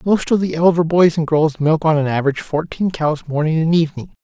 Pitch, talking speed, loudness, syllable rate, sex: 160 Hz, 225 wpm, -17 LUFS, 5.9 syllables/s, male